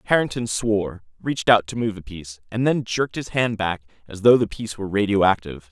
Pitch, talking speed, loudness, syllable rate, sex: 105 Hz, 210 wpm, -22 LUFS, 6.2 syllables/s, male